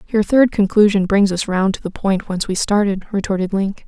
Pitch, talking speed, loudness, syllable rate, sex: 200 Hz, 215 wpm, -17 LUFS, 5.5 syllables/s, female